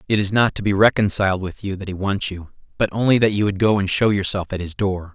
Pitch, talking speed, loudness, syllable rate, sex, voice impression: 100 Hz, 280 wpm, -20 LUFS, 6.1 syllables/s, male, masculine, adult-like, slightly refreshing, slightly friendly, slightly unique